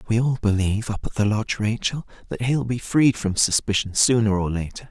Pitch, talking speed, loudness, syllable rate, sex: 110 Hz, 220 wpm, -22 LUFS, 5.8 syllables/s, male